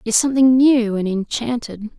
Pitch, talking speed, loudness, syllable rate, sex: 235 Hz, 180 wpm, -17 LUFS, 5.5 syllables/s, female